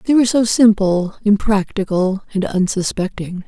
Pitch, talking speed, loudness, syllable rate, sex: 200 Hz, 120 wpm, -16 LUFS, 4.8 syllables/s, female